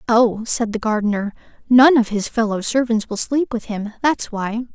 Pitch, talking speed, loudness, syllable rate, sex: 230 Hz, 190 wpm, -18 LUFS, 4.7 syllables/s, female